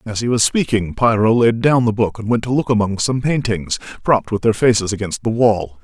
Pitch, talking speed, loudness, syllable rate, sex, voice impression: 110 Hz, 235 wpm, -17 LUFS, 5.5 syllables/s, male, masculine, adult-like, fluent, refreshing, slightly sincere, slightly unique